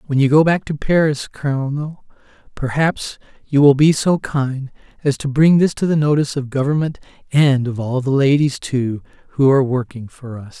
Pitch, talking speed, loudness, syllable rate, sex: 140 Hz, 185 wpm, -17 LUFS, 5.1 syllables/s, male